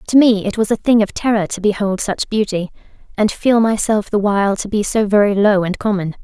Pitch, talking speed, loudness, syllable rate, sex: 205 Hz, 230 wpm, -16 LUFS, 5.6 syllables/s, female